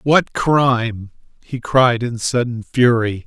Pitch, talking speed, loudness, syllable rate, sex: 120 Hz, 130 wpm, -17 LUFS, 3.5 syllables/s, male